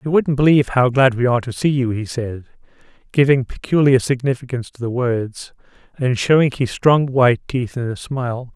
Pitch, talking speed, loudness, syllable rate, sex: 130 Hz, 190 wpm, -18 LUFS, 5.5 syllables/s, male